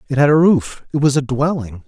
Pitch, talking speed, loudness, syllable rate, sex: 140 Hz, 225 wpm, -16 LUFS, 5.6 syllables/s, male